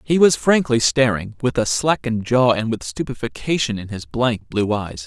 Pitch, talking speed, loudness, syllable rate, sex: 115 Hz, 190 wpm, -19 LUFS, 4.8 syllables/s, male